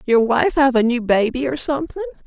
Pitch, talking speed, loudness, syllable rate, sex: 255 Hz, 210 wpm, -18 LUFS, 5.8 syllables/s, female